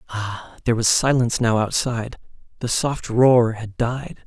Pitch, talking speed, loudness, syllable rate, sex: 115 Hz, 155 wpm, -20 LUFS, 4.6 syllables/s, male